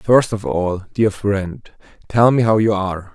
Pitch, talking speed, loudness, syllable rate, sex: 100 Hz, 190 wpm, -17 LUFS, 4.0 syllables/s, male